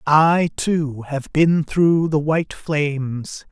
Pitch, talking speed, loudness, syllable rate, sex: 150 Hz, 135 wpm, -19 LUFS, 3.1 syllables/s, male